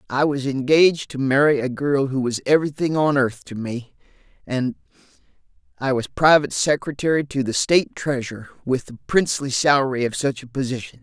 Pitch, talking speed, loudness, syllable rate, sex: 130 Hz, 165 wpm, -20 LUFS, 5.7 syllables/s, male